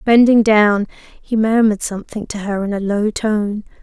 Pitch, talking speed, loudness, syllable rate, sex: 210 Hz, 175 wpm, -16 LUFS, 4.7 syllables/s, female